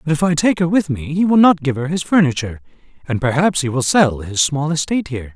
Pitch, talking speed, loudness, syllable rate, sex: 150 Hz, 260 wpm, -16 LUFS, 6.3 syllables/s, male